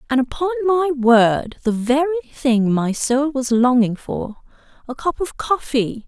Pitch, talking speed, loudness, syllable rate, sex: 270 Hz, 150 wpm, -19 LUFS, 4.2 syllables/s, female